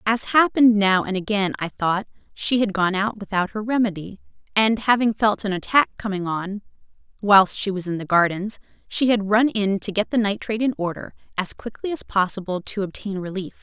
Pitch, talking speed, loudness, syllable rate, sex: 205 Hz, 195 wpm, -21 LUFS, 5.3 syllables/s, female